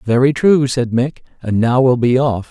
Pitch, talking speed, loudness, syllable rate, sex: 125 Hz, 215 wpm, -15 LUFS, 4.6 syllables/s, male